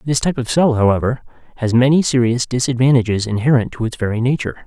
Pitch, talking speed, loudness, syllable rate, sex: 125 Hz, 180 wpm, -16 LUFS, 6.8 syllables/s, male